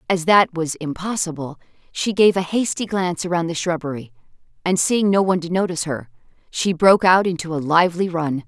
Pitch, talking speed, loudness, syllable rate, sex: 170 Hz, 185 wpm, -19 LUFS, 5.8 syllables/s, female